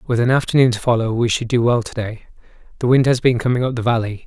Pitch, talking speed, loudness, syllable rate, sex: 120 Hz, 265 wpm, -17 LUFS, 6.8 syllables/s, male